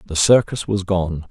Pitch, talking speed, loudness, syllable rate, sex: 95 Hz, 185 wpm, -18 LUFS, 4.5 syllables/s, male